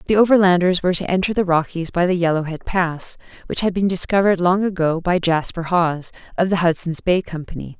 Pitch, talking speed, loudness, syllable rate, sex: 175 Hz, 190 wpm, -19 LUFS, 6.0 syllables/s, female